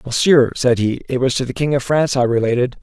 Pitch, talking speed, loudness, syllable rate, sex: 130 Hz, 255 wpm, -16 LUFS, 6.3 syllables/s, male